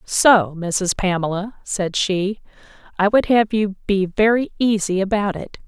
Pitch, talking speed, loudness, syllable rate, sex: 200 Hz, 150 wpm, -19 LUFS, 4.1 syllables/s, female